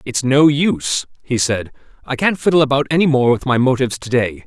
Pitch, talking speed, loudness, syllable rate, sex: 130 Hz, 215 wpm, -16 LUFS, 5.7 syllables/s, male